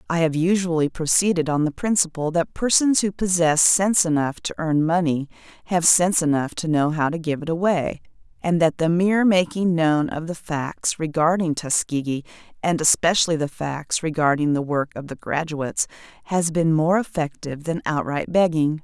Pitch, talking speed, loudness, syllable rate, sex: 165 Hz, 170 wpm, -21 LUFS, 5.1 syllables/s, female